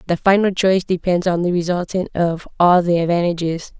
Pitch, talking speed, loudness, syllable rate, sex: 175 Hz, 175 wpm, -18 LUFS, 5.5 syllables/s, female